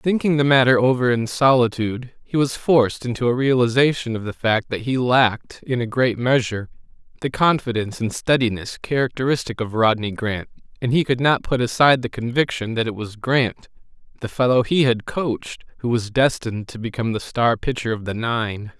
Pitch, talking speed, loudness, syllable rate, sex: 120 Hz, 185 wpm, -20 LUFS, 5.4 syllables/s, male